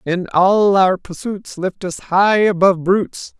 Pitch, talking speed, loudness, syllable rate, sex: 190 Hz, 160 wpm, -16 LUFS, 4.0 syllables/s, female